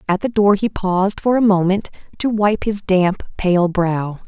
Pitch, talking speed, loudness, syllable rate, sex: 195 Hz, 195 wpm, -17 LUFS, 4.3 syllables/s, female